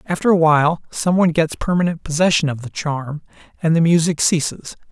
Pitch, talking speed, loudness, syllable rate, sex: 160 Hz, 185 wpm, -17 LUFS, 5.7 syllables/s, male